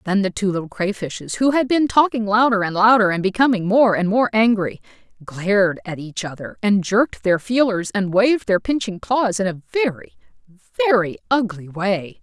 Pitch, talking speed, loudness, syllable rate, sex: 205 Hz, 180 wpm, -19 LUFS, 5.0 syllables/s, female